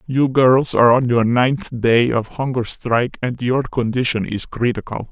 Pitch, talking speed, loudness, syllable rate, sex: 120 Hz, 175 wpm, -17 LUFS, 4.6 syllables/s, female